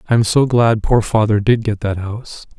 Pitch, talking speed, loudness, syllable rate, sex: 110 Hz, 230 wpm, -16 LUFS, 5.2 syllables/s, male